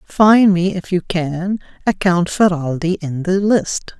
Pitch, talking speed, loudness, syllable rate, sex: 180 Hz, 165 wpm, -16 LUFS, 3.6 syllables/s, female